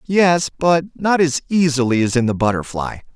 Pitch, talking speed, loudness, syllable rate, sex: 145 Hz, 170 wpm, -17 LUFS, 4.9 syllables/s, male